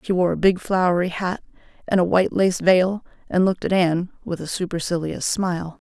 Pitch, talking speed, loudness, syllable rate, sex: 180 Hz, 195 wpm, -21 LUFS, 5.7 syllables/s, female